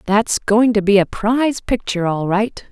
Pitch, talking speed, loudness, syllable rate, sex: 210 Hz, 200 wpm, -17 LUFS, 4.8 syllables/s, female